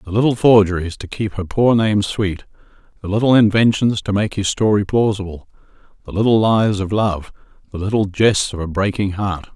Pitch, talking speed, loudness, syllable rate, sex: 100 Hz, 180 wpm, -17 LUFS, 5.2 syllables/s, male